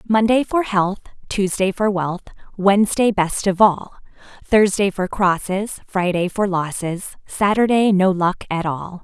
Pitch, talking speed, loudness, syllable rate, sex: 195 Hz, 140 wpm, -19 LUFS, 4.1 syllables/s, female